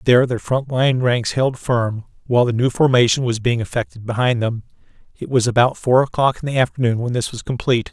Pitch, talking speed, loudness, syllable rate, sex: 120 Hz, 205 wpm, -18 LUFS, 5.8 syllables/s, male